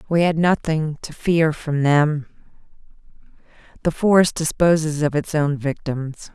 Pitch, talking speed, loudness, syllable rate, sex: 155 Hz, 130 wpm, -20 LUFS, 4.2 syllables/s, female